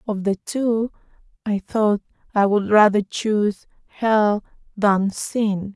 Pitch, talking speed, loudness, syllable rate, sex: 210 Hz, 125 wpm, -20 LUFS, 3.4 syllables/s, female